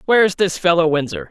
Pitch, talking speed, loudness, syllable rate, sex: 175 Hz, 185 wpm, -16 LUFS, 6.0 syllables/s, female